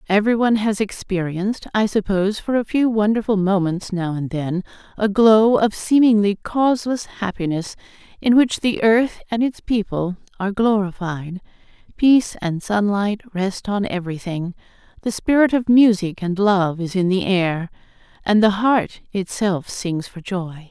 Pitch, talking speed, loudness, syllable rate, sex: 200 Hz, 140 wpm, -19 LUFS, 4.6 syllables/s, female